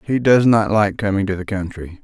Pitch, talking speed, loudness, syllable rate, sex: 105 Hz, 235 wpm, -17 LUFS, 5.3 syllables/s, male